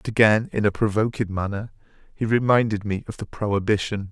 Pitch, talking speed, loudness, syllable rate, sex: 105 Hz, 175 wpm, -22 LUFS, 6.0 syllables/s, male